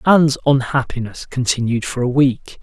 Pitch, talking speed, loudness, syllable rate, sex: 130 Hz, 135 wpm, -18 LUFS, 5.0 syllables/s, male